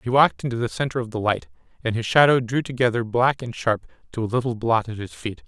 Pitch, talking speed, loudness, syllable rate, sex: 120 Hz, 250 wpm, -22 LUFS, 6.2 syllables/s, male